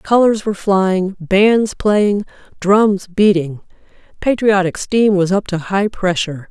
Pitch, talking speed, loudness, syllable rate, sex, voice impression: 195 Hz, 130 wpm, -15 LUFS, 3.8 syllables/s, female, feminine, adult-like, tensed, slightly bright, clear, fluent, intellectual, calm, friendly, reassuring, elegant, kind